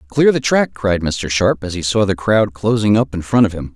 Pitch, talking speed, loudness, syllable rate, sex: 100 Hz, 270 wpm, -16 LUFS, 5.1 syllables/s, male